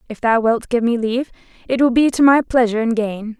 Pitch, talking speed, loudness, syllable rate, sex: 240 Hz, 245 wpm, -17 LUFS, 6.0 syllables/s, female